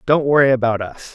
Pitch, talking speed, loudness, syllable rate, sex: 130 Hz, 210 wpm, -16 LUFS, 5.8 syllables/s, male